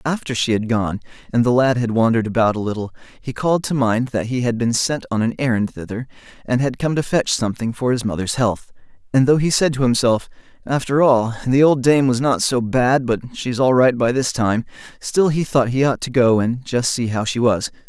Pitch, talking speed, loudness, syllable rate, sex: 125 Hz, 230 wpm, -18 LUFS, 5.6 syllables/s, male